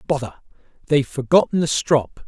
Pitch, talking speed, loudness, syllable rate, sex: 140 Hz, 130 wpm, -19 LUFS, 5.8 syllables/s, male